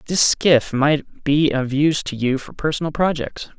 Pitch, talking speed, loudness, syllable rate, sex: 145 Hz, 185 wpm, -19 LUFS, 4.5 syllables/s, male